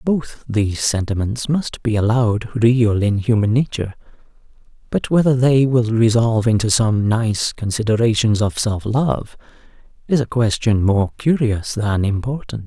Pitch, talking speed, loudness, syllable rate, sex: 115 Hz, 135 wpm, -18 LUFS, 4.5 syllables/s, male